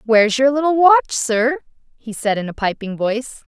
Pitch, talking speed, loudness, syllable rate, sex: 240 Hz, 185 wpm, -17 LUFS, 5.2 syllables/s, female